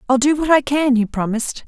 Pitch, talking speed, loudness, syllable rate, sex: 265 Hz, 250 wpm, -17 LUFS, 6.1 syllables/s, female